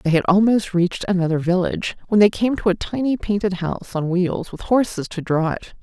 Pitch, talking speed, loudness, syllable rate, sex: 190 Hz, 215 wpm, -20 LUFS, 5.6 syllables/s, female